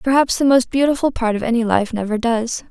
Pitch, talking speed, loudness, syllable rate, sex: 240 Hz, 220 wpm, -17 LUFS, 5.8 syllables/s, female